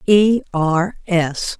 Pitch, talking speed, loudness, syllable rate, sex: 180 Hz, 115 wpm, -17 LUFS, 2.4 syllables/s, female